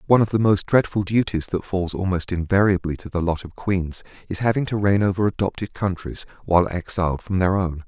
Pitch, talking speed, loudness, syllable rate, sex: 95 Hz, 205 wpm, -22 LUFS, 5.8 syllables/s, male